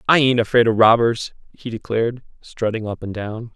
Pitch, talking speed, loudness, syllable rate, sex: 115 Hz, 185 wpm, -19 LUFS, 5.3 syllables/s, male